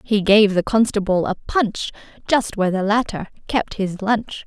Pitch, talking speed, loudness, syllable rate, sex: 205 Hz, 175 wpm, -19 LUFS, 4.6 syllables/s, female